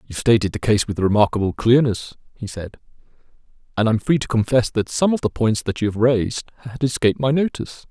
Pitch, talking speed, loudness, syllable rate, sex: 115 Hz, 220 wpm, -19 LUFS, 6.3 syllables/s, male